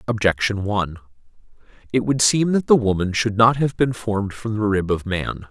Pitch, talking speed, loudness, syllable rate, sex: 105 Hz, 195 wpm, -20 LUFS, 5.2 syllables/s, male